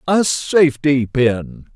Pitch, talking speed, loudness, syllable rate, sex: 140 Hz, 105 wpm, -16 LUFS, 3.3 syllables/s, male